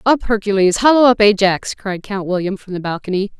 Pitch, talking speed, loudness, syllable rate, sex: 205 Hz, 195 wpm, -16 LUFS, 5.6 syllables/s, female